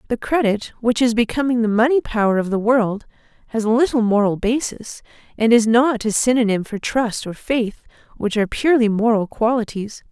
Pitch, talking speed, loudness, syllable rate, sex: 230 Hz, 170 wpm, -18 LUFS, 5.2 syllables/s, female